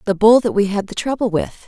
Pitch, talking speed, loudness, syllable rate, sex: 210 Hz, 285 wpm, -17 LUFS, 5.9 syllables/s, female